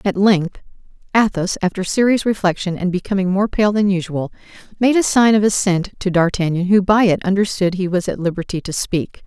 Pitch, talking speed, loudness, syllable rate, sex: 190 Hz, 190 wpm, -17 LUFS, 5.5 syllables/s, female